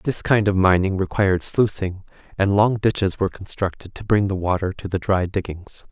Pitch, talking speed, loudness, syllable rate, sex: 95 Hz, 195 wpm, -21 LUFS, 5.3 syllables/s, male